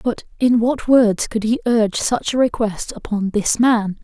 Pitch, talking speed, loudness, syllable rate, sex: 225 Hz, 195 wpm, -18 LUFS, 4.3 syllables/s, female